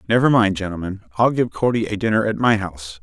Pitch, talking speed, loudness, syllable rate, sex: 105 Hz, 220 wpm, -19 LUFS, 6.1 syllables/s, male